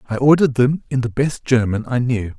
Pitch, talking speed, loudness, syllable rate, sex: 125 Hz, 225 wpm, -18 LUFS, 5.6 syllables/s, male